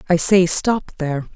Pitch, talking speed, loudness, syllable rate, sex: 170 Hz, 175 wpm, -17 LUFS, 5.0 syllables/s, female